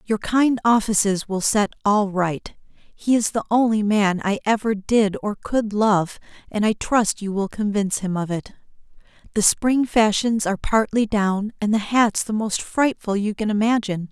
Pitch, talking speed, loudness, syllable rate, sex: 210 Hz, 180 wpm, -21 LUFS, 4.5 syllables/s, female